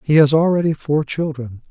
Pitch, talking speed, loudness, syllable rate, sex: 150 Hz, 175 wpm, -17 LUFS, 5.2 syllables/s, male